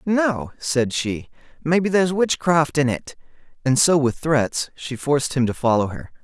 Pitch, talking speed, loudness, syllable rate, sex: 140 Hz, 175 wpm, -20 LUFS, 4.1 syllables/s, male